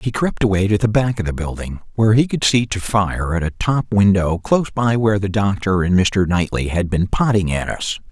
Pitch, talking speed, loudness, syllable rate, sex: 100 Hz, 235 wpm, -18 LUFS, 5.3 syllables/s, male